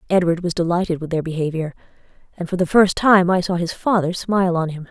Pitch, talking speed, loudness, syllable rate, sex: 175 Hz, 220 wpm, -19 LUFS, 6.1 syllables/s, female